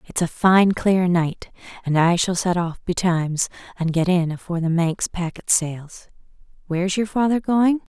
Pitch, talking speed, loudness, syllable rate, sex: 180 Hz, 175 wpm, -20 LUFS, 4.6 syllables/s, female